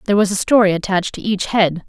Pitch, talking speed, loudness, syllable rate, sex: 195 Hz, 255 wpm, -16 LUFS, 7.0 syllables/s, female